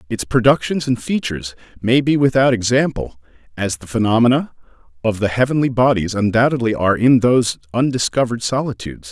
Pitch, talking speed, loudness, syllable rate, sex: 115 Hz, 140 wpm, -17 LUFS, 6.0 syllables/s, male